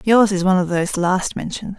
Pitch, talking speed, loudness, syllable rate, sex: 190 Hz, 235 wpm, -18 LUFS, 6.5 syllables/s, female